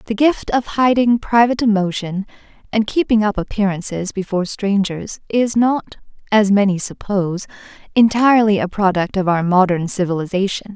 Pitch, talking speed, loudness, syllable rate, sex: 205 Hz, 135 wpm, -17 LUFS, 5.3 syllables/s, female